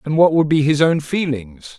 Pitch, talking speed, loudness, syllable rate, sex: 145 Hz, 235 wpm, -17 LUFS, 4.7 syllables/s, male